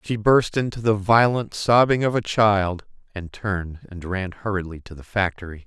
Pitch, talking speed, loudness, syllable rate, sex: 100 Hz, 180 wpm, -21 LUFS, 4.8 syllables/s, male